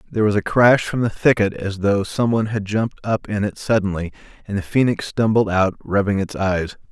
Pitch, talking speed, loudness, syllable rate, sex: 105 Hz, 210 wpm, -19 LUFS, 5.5 syllables/s, male